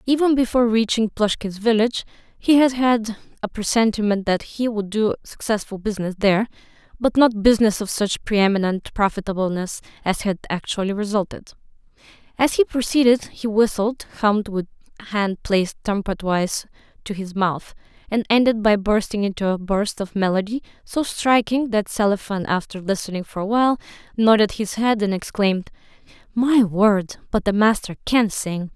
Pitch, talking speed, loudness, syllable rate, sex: 210 Hz, 150 wpm, -20 LUFS, 5.3 syllables/s, female